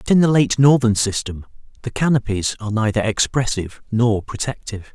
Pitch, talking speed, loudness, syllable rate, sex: 115 Hz, 160 wpm, -18 LUFS, 5.7 syllables/s, male